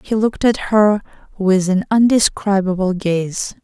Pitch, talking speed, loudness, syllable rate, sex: 200 Hz, 130 wpm, -16 LUFS, 4.3 syllables/s, female